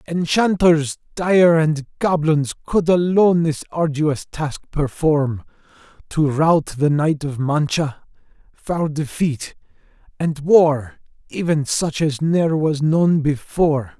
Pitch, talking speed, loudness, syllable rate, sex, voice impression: 155 Hz, 115 wpm, -18 LUFS, 3.6 syllables/s, male, very masculine, middle-aged, slightly thick, slightly powerful, unique, slightly lively, slightly intense